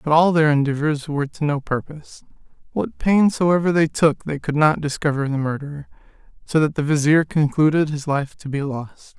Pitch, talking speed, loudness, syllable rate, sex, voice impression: 150 Hz, 190 wpm, -20 LUFS, 5.2 syllables/s, male, masculine, adult-like, slightly middle-aged, tensed, slightly weak, slightly dark, slightly hard, slightly muffled, fluent, slightly cool, intellectual, slightly refreshing, sincere, calm, slightly mature, slightly sweet, slightly kind, slightly modest